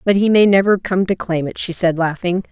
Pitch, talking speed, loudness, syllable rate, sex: 185 Hz, 260 wpm, -16 LUFS, 5.5 syllables/s, female